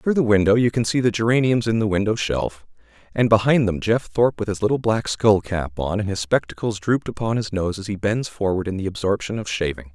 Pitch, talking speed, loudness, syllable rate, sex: 105 Hz, 240 wpm, -21 LUFS, 5.8 syllables/s, male